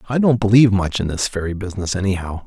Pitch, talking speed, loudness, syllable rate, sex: 100 Hz, 220 wpm, -18 LUFS, 7.0 syllables/s, male